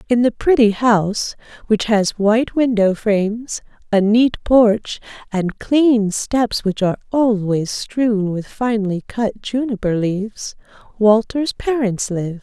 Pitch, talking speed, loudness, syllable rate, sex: 220 Hz, 130 wpm, -17 LUFS, 3.8 syllables/s, female